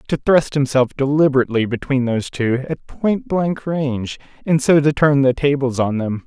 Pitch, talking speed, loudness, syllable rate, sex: 140 Hz, 170 wpm, -18 LUFS, 4.8 syllables/s, male